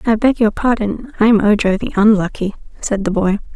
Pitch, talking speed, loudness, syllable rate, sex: 215 Hz, 185 wpm, -15 LUFS, 5.2 syllables/s, female